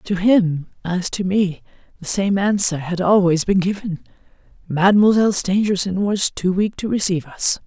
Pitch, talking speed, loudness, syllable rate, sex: 190 Hz, 155 wpm, -18 LUFS, 4.8 syllables/s, female